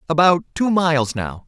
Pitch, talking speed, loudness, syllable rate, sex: 155 Hz, 165 wpm, -18 LUFS, 5.0 syllables/s, male